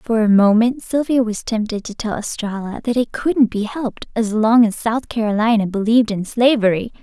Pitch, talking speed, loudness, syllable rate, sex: 225 Hz, 190 wpm, -18 LUFS, 5.2 syllables/s, female